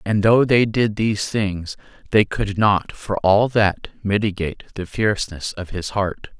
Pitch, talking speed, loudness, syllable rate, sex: 100 Hz, 170 wpm, -20 LUFS, 4.3 syllables/s, male